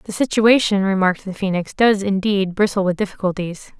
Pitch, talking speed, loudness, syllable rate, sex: 195 Hz, 160 wpm, -18 LUFS, 5.4 syllables/s, female